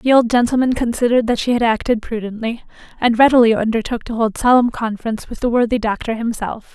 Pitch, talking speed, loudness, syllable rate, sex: 230 Hz, 185 wpm, -17 LUFS, 6.3 syllables/s, female